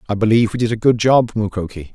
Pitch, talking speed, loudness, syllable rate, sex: 110 Hz, 245 wpm, -16 LUFS, 6.8 syllables/s, male